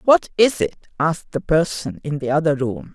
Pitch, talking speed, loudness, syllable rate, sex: 160 Hz, 205 wpm, -20 LUFS, 5.2 syllables/s, female